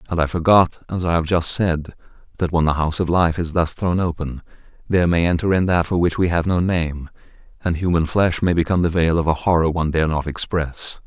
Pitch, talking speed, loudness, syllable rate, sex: 85 Hz, 235 wpm, -19 LUFS, 5.8 syllables/s, male